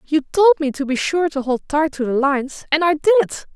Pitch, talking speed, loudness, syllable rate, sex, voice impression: 300 Hz, 255 wpm, -18 LUFS, 5.1 syllables/s, female, feminine, adult-like, slightly muffled, intellectual, slightly sweet